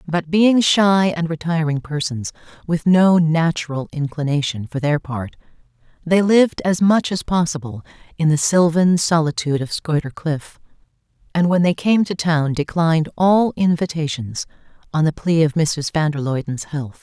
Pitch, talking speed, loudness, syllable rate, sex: 160 Hz, 150 wpm, -18 LUFS, 4.6 syllables/s, female